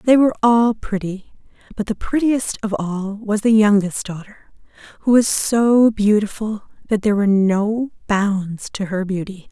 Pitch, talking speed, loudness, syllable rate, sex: 210 Hz, 160 wpm, -18 LUFS, 4.4 syllables/s, female